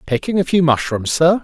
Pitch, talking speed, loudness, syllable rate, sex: 160 Hz, 210 wpm, -16 LUFS, 5.3 syllables/s, male